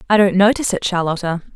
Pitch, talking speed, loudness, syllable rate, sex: 190 Hz, 195 wpm, -17 LUFS, 7.1 syllables/s, female